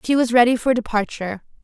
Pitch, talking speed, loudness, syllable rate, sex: 240 Hz, 185 wpm, -19 LUFS, 6.5 syllables/s, female